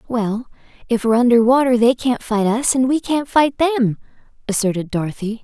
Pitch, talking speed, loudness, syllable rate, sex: 240 Hz, 175 wpm, -17 LUFS, 5.2 syllables/s, female